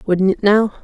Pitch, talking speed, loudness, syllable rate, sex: 200 Hz, 215 wpm, -15 LUFS, 4.8 syllables/s, female